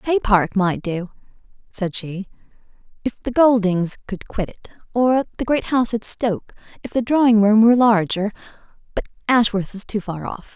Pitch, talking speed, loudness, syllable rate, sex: 215 Hz, 165 wpm, -19 LUFS, 5.0 syllables/s, female